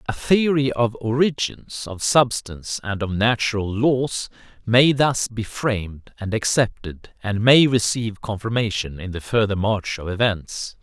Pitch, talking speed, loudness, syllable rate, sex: 110 Hz, 145 wpm, -21 LUFS, 4.3 syllables/s, male